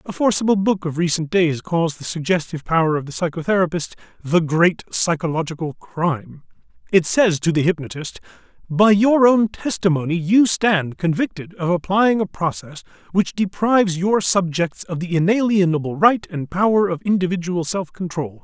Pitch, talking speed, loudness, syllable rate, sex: 175 Hz, 155 wpm, -19 LUFS, 5.1 syllables/s, male